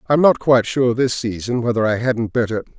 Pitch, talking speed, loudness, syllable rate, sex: 120 Hz, 215 wpm, -18 LUFS, 5.4 syllables/s, male